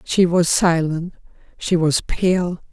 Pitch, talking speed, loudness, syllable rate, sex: 170 Hz, 130 wpm, -18 LUFS, 3.3 syllables/s, female